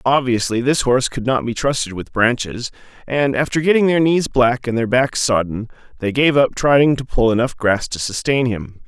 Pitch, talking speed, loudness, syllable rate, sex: 125 Hz, 205 wpm, -17 LUFS, 5.0 syllables/s, male